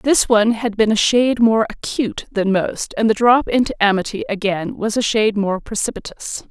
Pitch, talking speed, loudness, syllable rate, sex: 220 Hz, 195 wpm, -17 LUFS, 5.3 syllables/s, female